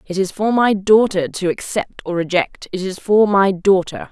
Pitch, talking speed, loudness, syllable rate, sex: 190 Hz, 205 wpm, -17 LUFS, 4.6 syllables/s, female